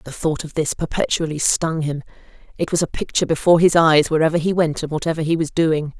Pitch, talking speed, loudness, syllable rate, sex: 155 Hz, 220 wpm, -19 LUFS, 6.2 syllables/s, female